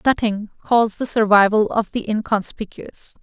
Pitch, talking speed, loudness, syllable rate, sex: 215 Hz, 130 wpm, -18 LUFS, 4.4 syllables/s, female